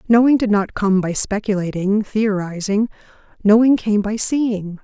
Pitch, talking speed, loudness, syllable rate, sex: 210 Hz, 135 wpm, -18 LUFS, 4.4 syllables/s, female